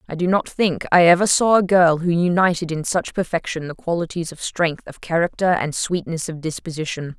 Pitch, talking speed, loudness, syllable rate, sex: 170 Hz, 200 wpm, -19 LUFS, 5.3 syllables/s, female